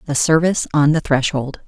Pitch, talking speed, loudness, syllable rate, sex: 150 Hz, 180 wpm, -17 LUFS, 5.6 syllables/s, female